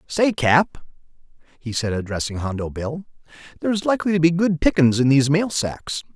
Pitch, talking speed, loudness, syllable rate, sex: 150 Hz, 165 wpm, -20 LUFS, 5.4 syllables/s, male